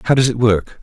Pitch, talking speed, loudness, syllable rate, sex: 115 Hz, 290 wpm, -15 LUFS, 6.2 syllables/s, male